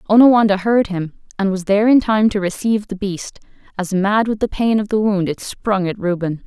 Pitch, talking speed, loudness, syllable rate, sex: 200 Hz, 225 wpm, -17 LUFS, 5.4 syllables/s, female